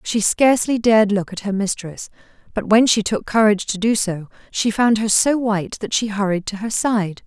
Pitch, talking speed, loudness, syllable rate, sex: 215 Hz, 215 wpm, -18 LUFS, 5.2 syllables/s, female